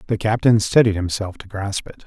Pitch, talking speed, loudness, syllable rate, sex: 100 Hz, 205 wpm, -19 LUFS, 5.3 syllables/s, male